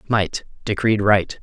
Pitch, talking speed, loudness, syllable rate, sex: 105 Hz, 125 wpm, -20 LUFS, 3.8 syllables/s, male